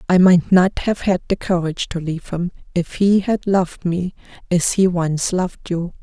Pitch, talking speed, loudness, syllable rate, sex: 180 Hz, 190 wpm, -19 LUFS, 4.9 syllables/s, female